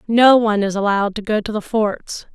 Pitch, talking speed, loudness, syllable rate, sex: 210 Hz, 230 wpm, -17 LUFS, 5.6 syllables/s, female